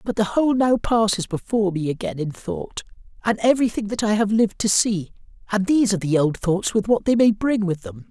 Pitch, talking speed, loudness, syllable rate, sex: 205 Hz, 230 wpm, -21 LUFS, 5.8 syllables/s, male